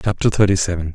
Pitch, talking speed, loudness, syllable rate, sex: 90 Hz, 190 wpm, -18 LUFS, 7.1 syllables/s, male